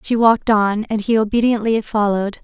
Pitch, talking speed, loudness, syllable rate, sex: 215 Hz, 175 wpm, -17 LUFS, 5.6 syllables/s, female